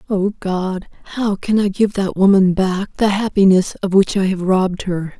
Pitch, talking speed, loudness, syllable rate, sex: 195 Hz, 195 wpm, -17 LUFS, 4.6 syllables/s, female